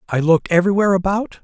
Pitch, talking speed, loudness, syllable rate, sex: 185 Hz, 165 wpm, -16 LUFS, 7.9 syllables/s, male